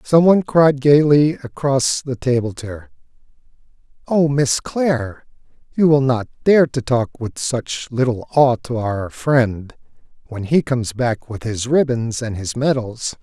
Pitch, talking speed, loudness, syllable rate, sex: 130 Hz, 155 wpm, -18 LUFS, 4.1 syllables/s, male